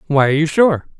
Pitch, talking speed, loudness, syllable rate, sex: 160 Hz, 240 wpm, -15 LUFS, 6.9 syllables/s, male